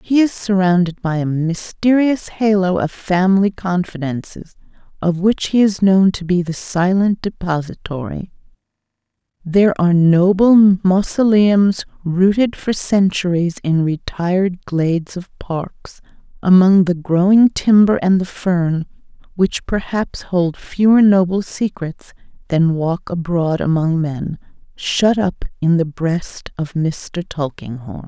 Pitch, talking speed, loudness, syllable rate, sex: 180 Hz, 125 wpm, -16 LUFS, 3.9 syllables/s, female